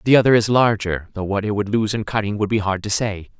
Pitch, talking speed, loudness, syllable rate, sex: 105 Hz, 285 wpm, -19 LUFS, 6.0 syllables/s, male